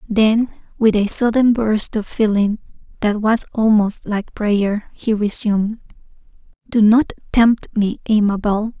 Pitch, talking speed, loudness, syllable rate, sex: 215 Hz, 130 wpm, -17 LUFS, 3.9 syllables/s, female